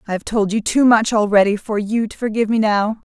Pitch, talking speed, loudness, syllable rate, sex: 215 Hz, 250 wpm, -17 LUFS, 5.9 syllables/s, female